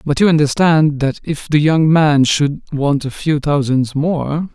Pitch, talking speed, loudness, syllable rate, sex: 150 Hz, 185 wpm, -15 LUFS, 4.0 syllables/s, male